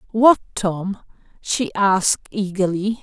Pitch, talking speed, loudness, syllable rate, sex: 200 Hz, 100 wpm, -19 LUFS, 3.7 syllables/s, female